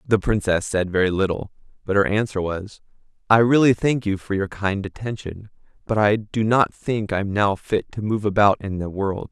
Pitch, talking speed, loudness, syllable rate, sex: 100 Hz, 205 wpm, -21 LUFS, 5.1 syllables/s, male